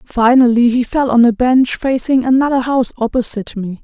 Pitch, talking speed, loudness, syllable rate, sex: 245 Hz, 170 wpm, -14 LUFS, 5.4 syllables/s, female